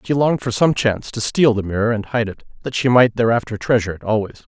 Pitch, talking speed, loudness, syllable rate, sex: 115 Hz, 235 wpm, -18 LUFS, 6.6 syllables/s, male